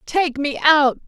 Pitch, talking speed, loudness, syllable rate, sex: 295 Hz, 170 wpm, -17 LUFS, 3.8 syllables/s, female